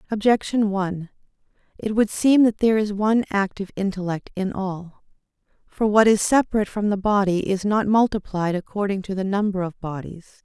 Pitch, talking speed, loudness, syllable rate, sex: 200 Hz, 165 wpm, -21 LUFS, 5.6 syllables/s, female